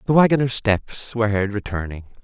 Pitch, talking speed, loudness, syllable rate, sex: 110 Hz, 160 wpm, -20 LUFS, 5.8 syllables/s, male